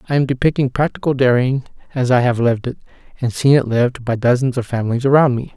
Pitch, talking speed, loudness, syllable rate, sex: 130 Hz, 215 wpm, -17 LUFS, 6.6 syllables/s, male